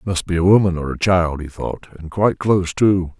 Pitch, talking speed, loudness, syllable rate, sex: 90 Hz, 265 wpm, -18 LUFS, 5.6 syllables/s, male